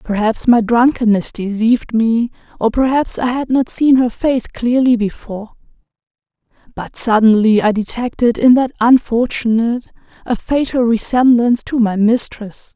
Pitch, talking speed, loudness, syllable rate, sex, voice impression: 235 Hz, 130 wpm, -14 LUFS, 4.7 syllables/s, female, very feminine, adult-like, slightly middle-aged, thin, relaxed, weak, slightly dark, soft, slightly clear, slightly fluent, cute, intellectual, slightly refreshing, very sincere, very calm, friendly, very reassuring, unique, elegant, sweet, very kind, very modest